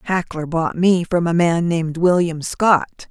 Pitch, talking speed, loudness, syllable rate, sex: 170 Hz, 175 wpm, -18 LUFS, 4.1 syllables/s, female